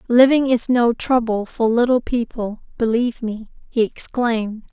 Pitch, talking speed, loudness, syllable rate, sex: 235 Hz, 140 wpm, -19 LUFS, 4.6 syllables/s, female